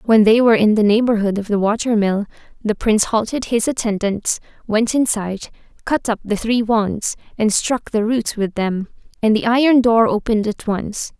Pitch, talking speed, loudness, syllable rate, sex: 220 Hz, 190 wpm, -17 LUFS, 5.0 syllables/s, female